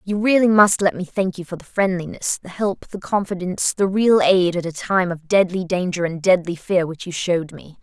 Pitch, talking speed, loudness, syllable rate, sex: 185 Hz, 230 wpm, -19 LUFS, 5.2 syllables/s, female